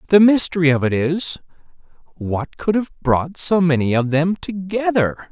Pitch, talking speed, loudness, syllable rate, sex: 170 Hz, 160 wpm, -18 LUFS, 4.6 syllables/s, male